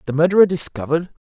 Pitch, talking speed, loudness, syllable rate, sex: 165 Hz, 145 wpm, -17 LUFS, 8.1 syllables/s, male